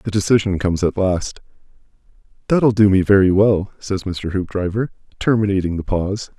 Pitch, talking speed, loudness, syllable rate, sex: 100 Hz, 150 wpm, -18 LUFS, 5.3 syllables/s, male